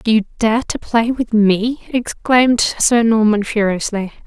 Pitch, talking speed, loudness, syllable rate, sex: 225 Hz, 155 wpm, -16 LUFS, 4.1 syllables/s, female